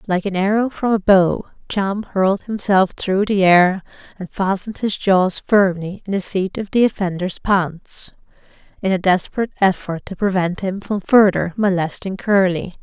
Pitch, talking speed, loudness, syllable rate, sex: 195 Hz, 165 wpm, -18 LUFS, 4.7 syllables/s, female